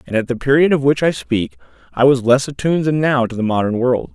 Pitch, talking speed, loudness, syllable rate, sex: 130 Hz, 260 wpm, -16 LUFS, 6.0 syllables/s, male